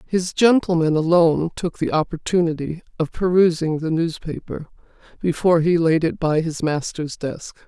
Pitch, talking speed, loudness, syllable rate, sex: 165 Hz, 140 wpm, -20 LUFS, 4.9 syllables/s, female